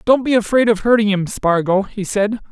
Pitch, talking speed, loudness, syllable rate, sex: 210 Hz, 215 wpm, -16 LUFS, 5.2 syllables/s, male